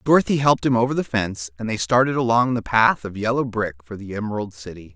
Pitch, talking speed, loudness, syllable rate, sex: 115 Hz, 230 wpm, -21 LUFS, 6.3 syllables/s, male